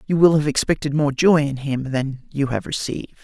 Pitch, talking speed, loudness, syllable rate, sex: 145 Hz, 225 wpm, -20 LUFS, 5.3 syllables/s, male